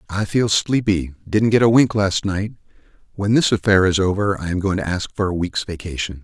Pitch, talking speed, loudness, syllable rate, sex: 100 Hz, 210 wpm, -19 LUFS, 5.3 syllables/s, male